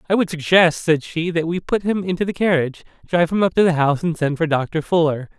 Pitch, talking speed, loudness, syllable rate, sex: 165 Hz, 255 wpm, -19 LUFS, 6.2 syllables/s, male